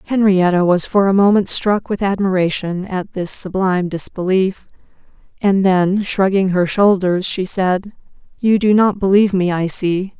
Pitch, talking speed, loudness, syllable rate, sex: 190 Hz, 155 wpm, -16 LUFS, 4.5 syllables/s, female